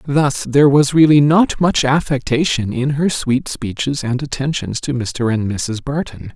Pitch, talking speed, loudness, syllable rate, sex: 135 Hz, 170 wpm, -16 LUFS, 4.4 syllables/s, male